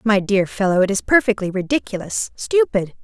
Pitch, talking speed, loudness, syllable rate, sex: 210 Hz, 140 wpm, -19 LUFS, 5.3 syllables/s, female